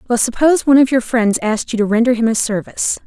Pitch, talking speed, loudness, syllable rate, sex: 235 Hz, 255 wpm, -15 LUFS, 7.1 syllables/s, female